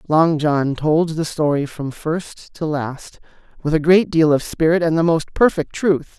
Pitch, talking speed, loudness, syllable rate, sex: 155 Hz, 195 wpm, -18 LUFS, 4.1 syllables/s, male